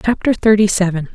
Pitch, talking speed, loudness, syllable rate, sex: 200 Hz, 155 wpm, -14 LUFS, 5.9 syllables/s, female